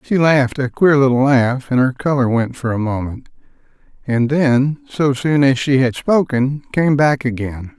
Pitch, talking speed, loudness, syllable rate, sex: 135 Hz, 185 wpm, -16 LUFS, 4.4 syllables/s, male